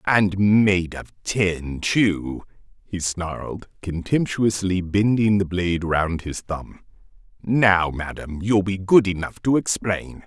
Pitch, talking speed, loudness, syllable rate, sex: 95 Hz, 130 wpm, -21 LUFS, 3.4 syllables/s, male